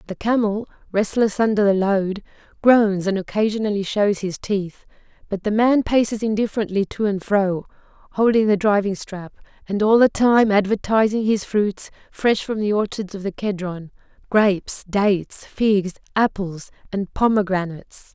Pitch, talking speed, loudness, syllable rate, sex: 205 Hz, 140 wpm, -20 LUFS, 4.7 syllables/s, female